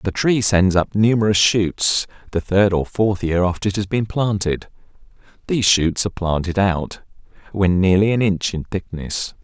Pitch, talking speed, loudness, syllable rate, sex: 100 Hz, 170 wpm, -18 LUFS, 4.7 syllables/s, male